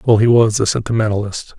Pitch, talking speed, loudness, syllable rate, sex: 110 Hz, 190 wpm, -15 LUFS, 6.1 syllables/s, male